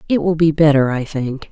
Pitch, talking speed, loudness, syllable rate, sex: 150 Hz, 240 wpm, -16 LUFS, 5.3 syllables/s, female